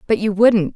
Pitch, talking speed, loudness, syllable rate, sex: 205 Hz, 240 wpm, -15 LUFS, 4.7 syllables/s, female